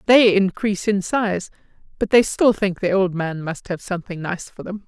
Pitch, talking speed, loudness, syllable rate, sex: 195 Hz, 210 wpm, -20 LUFS, 5.0 syllables/s, female